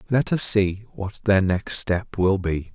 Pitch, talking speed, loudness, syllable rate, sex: 100 Hz, 195 wpm, -21 LUFS, 3.9 syllables/s, male